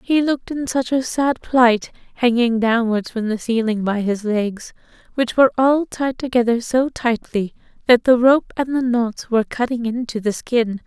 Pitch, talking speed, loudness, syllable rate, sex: 240 Hz, 180 wpm, -19 LUFS, 4.6 syllables/s, female